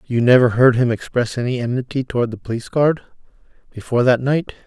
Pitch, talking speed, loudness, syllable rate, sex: 125 Hz, 165 wpm, -18 LUFS, 6.4 syllables/s, male